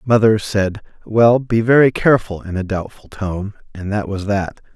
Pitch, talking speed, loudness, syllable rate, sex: 105 Hz, 175 wpm, -17 LUFS, 4.6 syllables/s, male